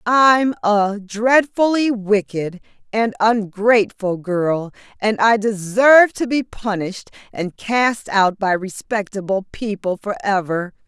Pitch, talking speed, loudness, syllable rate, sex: 210 Hz, 110 wpm, -18 LUFS, 3.8 syllables/s, female